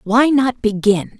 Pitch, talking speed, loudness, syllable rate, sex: 230 Hz, 150 wpm, -16 LUFS, 3.9 syllables/s, female